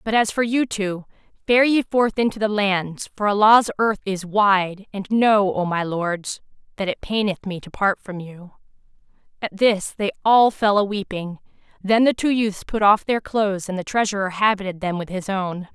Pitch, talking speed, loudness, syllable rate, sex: 200 Hz, 200 wpm, -20 LUFS, 4.6 syllables/s, female